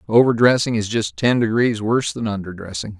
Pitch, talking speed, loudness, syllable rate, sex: 115 Hz, 160 wpm, -19 LUFS, 5.7 syllables/s, male